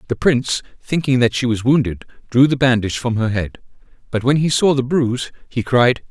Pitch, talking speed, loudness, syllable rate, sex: 125 Hz, 205 wpm, -17 LUFS, 5.6 syllables/s, male